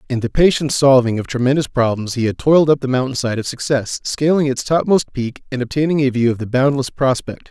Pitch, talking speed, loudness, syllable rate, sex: 130 Hz, 215 wpm, -17 LUFS, 5.8 syllables/s, male